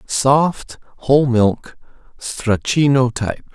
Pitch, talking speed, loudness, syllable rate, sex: 130 Hz, 85 wpm, -16 LUFS, 3.2 syllables/s, male